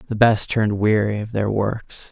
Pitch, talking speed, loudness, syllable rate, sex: 105 Hz, 200 wpm, -20 LUFS, 4.7 syllables/s, male